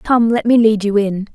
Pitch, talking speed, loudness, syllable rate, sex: 220 Hz, 270 wpm, -14 LUFS, 4.8 syllables/s, female